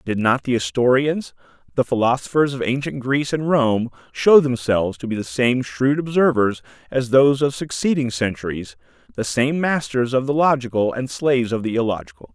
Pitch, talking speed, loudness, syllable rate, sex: 125 Hz, 170 wpm, -20 LUFS, 5.3 syllables/s, male